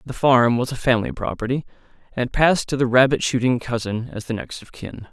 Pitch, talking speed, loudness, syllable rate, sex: 125 Hz, 210 wpm, -20 LUFS, 5.8 syllables/s, male